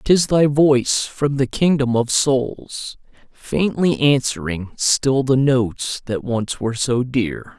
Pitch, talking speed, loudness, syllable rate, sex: 130 Hz, 140 wpm, -18 LUFS, 3.5 syllables/s, male